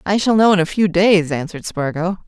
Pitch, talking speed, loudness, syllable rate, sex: 180 Hz, 235 wpm, -16 LUFS, 5.8 syllables/s, female